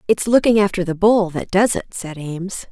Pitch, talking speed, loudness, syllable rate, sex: 190 Hz, 220 wpm, -18 LUFS, 5.2 syllables/s, female